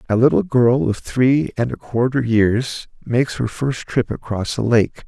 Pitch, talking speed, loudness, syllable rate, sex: 120 Hz, 190 wpm, -18 LUFS, 4.2 syllables/s, male